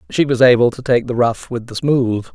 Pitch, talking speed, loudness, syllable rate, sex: 120 Hz, 255 wpm, -16 LUFS, 5.2 syllables/s, male